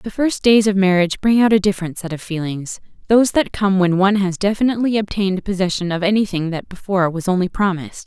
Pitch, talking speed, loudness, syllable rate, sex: 195 Hz, 210 wpm, -17 LUFS, 6.5 syllables/s, female